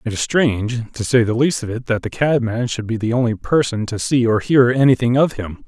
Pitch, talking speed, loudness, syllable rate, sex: 120 Hz, 255 wpm, -18 LUFS, 5.6 syllables/s, male